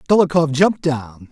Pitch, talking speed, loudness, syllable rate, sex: 150 Hz, 135 wpm, -17 LUFS, 5.5 syllables/s, male